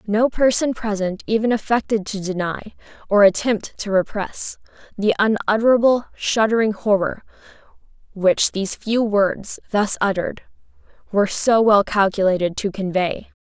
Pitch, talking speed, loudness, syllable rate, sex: 210 Hz, 120 wpm, -19 LUFS, 4.8 syllables/s, female